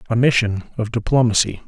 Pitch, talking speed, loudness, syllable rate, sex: 115 Hz, 145 wpm, -18 LUFS, 6.1 syllables/s, male